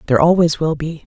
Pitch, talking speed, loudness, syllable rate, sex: 160 Hz, 210 wpm, -16 LUFS, 6.7 syllables/s, female